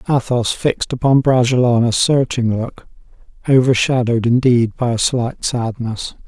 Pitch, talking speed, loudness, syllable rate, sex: 120 Hz, 125 wpm, -16 LUFS, 4.8 syllables/s, male